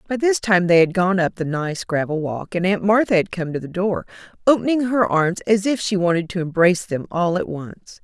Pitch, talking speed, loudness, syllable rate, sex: 185 Hz, 240 wpm, -19 LUFS, 5.3 syllables/s, female